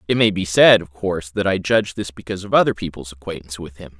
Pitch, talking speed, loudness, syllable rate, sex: 90 Hz, 255 wpm, -18 LUFS, 6.8 syllables/s, male